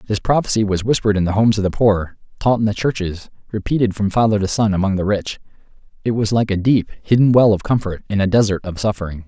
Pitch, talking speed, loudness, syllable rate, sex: 105 Hz, 235 wpm, -17 LUFS, 6.4 syllables/s, male